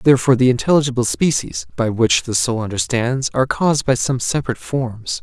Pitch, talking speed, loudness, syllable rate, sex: 125 Hz, 170 wpm, -18 LUFS, 6.0 syllables/s, male